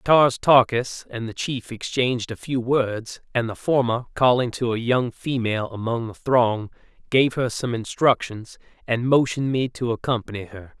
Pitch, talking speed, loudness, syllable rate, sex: 120 Hz, 165 wpm, -22 LUFS, 4.6 syllables/s, male